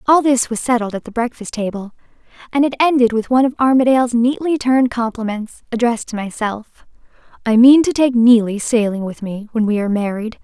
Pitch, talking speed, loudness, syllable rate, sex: 235 Hz, 190 wpm, -16 LUFS, 5.9 syllables/s, female